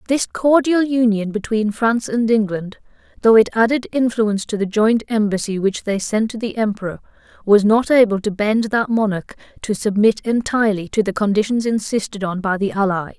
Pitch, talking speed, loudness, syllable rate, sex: 215 Hz, 175 wpm, -18 LUFS, 5.3 syllables/s, female